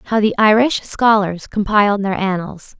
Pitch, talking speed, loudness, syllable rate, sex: 205 Hz, 150 wpm, -16 LUFS, 4.4 syllables/s, female